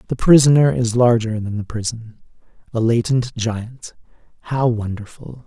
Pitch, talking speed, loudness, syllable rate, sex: 115 Hz, 130 wpm, -18 LUFS, 4.5 syllables/s, male